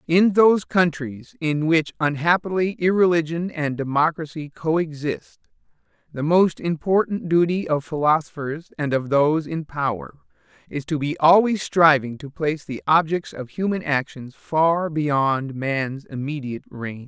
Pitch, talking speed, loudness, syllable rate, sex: 155 Hz, 135 wpm, -21 LUFS, 4.4 syllables/s, male